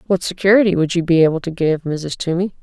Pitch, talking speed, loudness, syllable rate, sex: 175 Hz, 230 wpm, -17 LUFS, 6.3 syllables/s, female